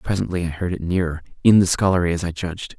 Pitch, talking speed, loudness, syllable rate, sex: 90 Hz, 215 wpm, -20 LUFS, 6.8 syllables/s, male